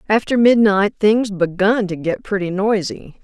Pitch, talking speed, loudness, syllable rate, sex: 205 Hz, 150 wpm, -17 LUFS, 4.3 syllables/s, female